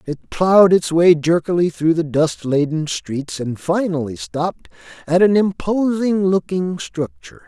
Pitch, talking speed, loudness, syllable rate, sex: 170 Hz, 145 wpm, -18 LUFS, 4.3 syllables/s, male